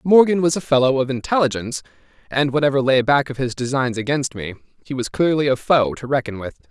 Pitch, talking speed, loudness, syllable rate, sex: 130 Hz, 205 wpm, -19 LUFS, 6.1 syllables/s, male